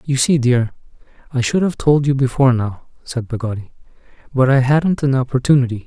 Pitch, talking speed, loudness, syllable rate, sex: 130 Hz, 175 wpm, -17 LUFS, 5.7 syllables/s, male